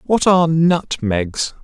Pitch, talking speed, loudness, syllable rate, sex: 155 Hz, 110 wpm, -16 LUFS, 3.4 syllables/s, male